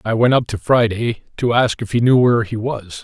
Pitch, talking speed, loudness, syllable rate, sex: 115 Hz, 255 wpm, -17 LUFS, 5.3 syllables/s, male